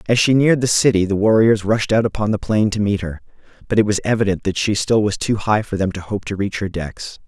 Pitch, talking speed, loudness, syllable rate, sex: 105 Hz, 270 wpm, -18 LUFS, 6.0 syllables/s, male